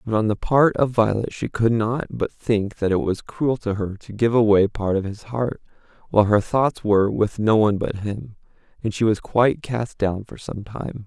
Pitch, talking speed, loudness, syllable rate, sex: 110 Hz, 230 wpm, -21 LUFS, 4.8 syllables/s, male